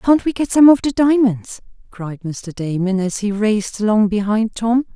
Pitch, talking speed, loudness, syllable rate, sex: 220 Hz, 195 wpm, -17 LUFS, 4.7 syllables/s, female